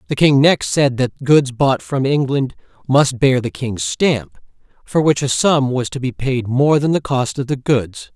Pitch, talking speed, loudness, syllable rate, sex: 135 Hz, 220 wpm, -16 LUFS, 4.2 syllables/s, male